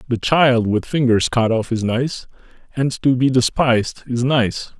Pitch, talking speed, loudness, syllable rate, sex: 125 Hz, 175 wpm, -18 LUFS, 4.3 syllables/s, male